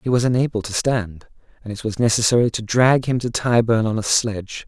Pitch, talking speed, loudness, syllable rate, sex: 115 Hz, 220 wpm, -19 LUFS, 5.6 syllables/s, male